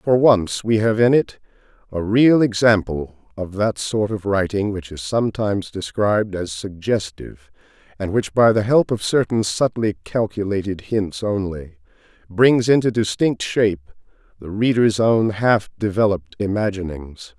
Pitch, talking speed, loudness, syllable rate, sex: 105 Hz, 140 wpm, -19 LUFS, 4.6 syllables/s, male